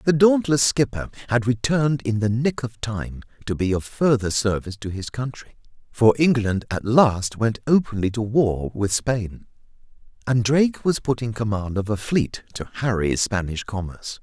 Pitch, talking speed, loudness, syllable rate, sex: 115 Hz, 175 wpm, -22 LUFS, 4.8 syllables/s, male